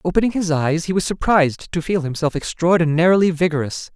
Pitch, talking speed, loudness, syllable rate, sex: 165 Hz, 165 wpm, -18 LUFS, 6.0 syllables/s, male